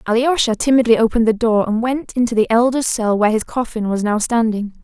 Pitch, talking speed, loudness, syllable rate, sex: 230 Hz, 210 wpm, -16 LUFS, 6.0 syllables/s, female